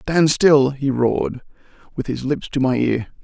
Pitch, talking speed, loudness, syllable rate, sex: 135 Hz, 185 wpm, -19 LUFS, 4.2 syllables/s, male